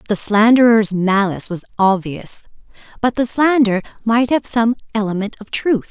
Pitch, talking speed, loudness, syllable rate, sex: 220 Hz, 140 wpm, -16 LUFS, 4.8 syllables/s, female